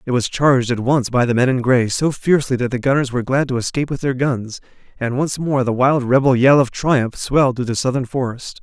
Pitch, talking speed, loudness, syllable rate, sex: 130 Hz, 250 wpm, -17 LUFS, 5.8 syllables/s, male